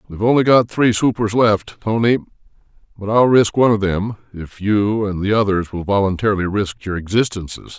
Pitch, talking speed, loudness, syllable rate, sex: 105 Hz, 175 wpm, -17 LUFS, 5.6 syllables/s, male